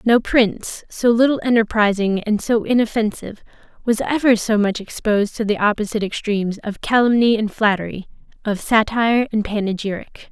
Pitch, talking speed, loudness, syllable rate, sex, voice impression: 215 Hz, 145 wpm, -18 LUFS, 5.5 syllables/s, female, very feminine, young, slightly adult-like, very thin, tensed, slightly weak, very bright, slightly soft, very clear, fluent, very cute, very intellectual, refreshing, very sincere, calm, very friendly, very reassuring, very unique, very elegant, slightly wild, very sweet, lively, very kind, slightly intense, slightly sharp, light